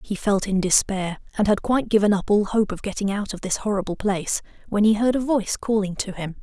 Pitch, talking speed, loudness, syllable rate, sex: 205 Hz, 245 wpm, -22 LUFS, 6.0 syllables/s, female